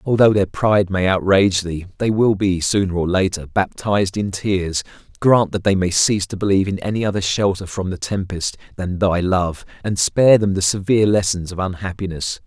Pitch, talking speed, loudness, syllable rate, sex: 95 Hz, 195 wpm, -18 LUFS, 5.4 syllables/s, male